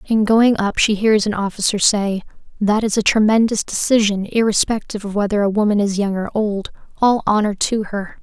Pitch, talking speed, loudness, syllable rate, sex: 210 Hz, 190 wpm, -17 LUFS, 5.4 syllables/s, female